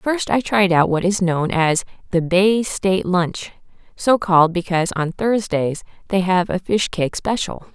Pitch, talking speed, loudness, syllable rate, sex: 185 Hz, 170 wpm, -19 LUFS, 4.5 syllables/s, female